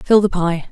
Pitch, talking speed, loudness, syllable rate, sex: 185 Hz, 250 wpm, -16 LUFS, 4.9 syllables/s, female